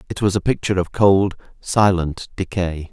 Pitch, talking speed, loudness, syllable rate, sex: 95 Hz, 165 wpm, -19 LUFS, 5.0 syllables/s, male